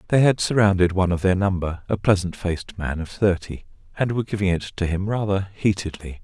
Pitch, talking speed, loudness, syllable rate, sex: 95 Hz, 200 wpm, -22 LUFS, 5.9 syllables/s, male